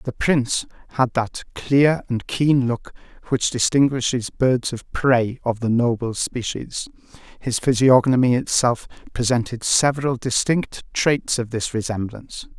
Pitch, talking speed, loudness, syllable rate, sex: 125 Hz, 130 wpm, -20 LUFS, 4.2 syllables/s, male